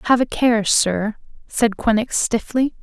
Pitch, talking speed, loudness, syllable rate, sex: 225 Hz, 150 wpm, -19 LUFS, 3.9 syllables/s, female